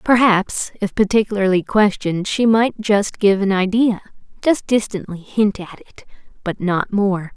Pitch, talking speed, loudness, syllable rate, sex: 200 Hz, 130 wpm, -18 LUFS, 4.6 syllables/s, female